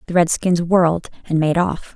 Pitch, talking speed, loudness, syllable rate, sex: 170 Hz, 185 wpm, -18 LUFS, 4.9 syllables/s, female